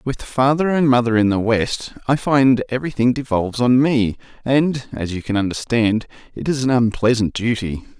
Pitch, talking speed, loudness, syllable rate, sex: 120 Hz, 180 wpm, -18 LUFS, 5.1 syllables/s, male